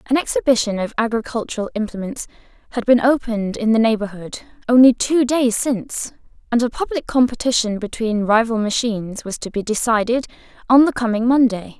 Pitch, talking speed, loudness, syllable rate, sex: 230 Hz, 155 wpm, -18 LUFS, 5.7 syllables/s, female